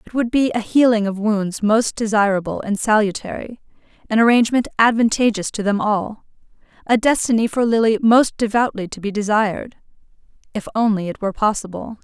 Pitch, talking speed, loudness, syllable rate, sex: 215 Hz, 150 wpm, -18 LUFS, 5.5 syllables/s, female